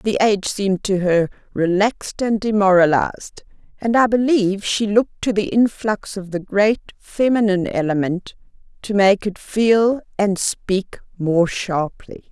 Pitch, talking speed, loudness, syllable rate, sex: 200 Hz, 140 wpm, -18 LUFS, 4.4 syllables/s, female